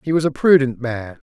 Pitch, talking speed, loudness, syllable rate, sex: 135 Hz, 230 wpm, -17 LUFS, 5.3 syllables/s, male